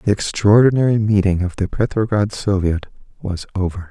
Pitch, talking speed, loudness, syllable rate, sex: 100 Hz, 140 wpm, -18 LUFS, 5.2 syllables/s, male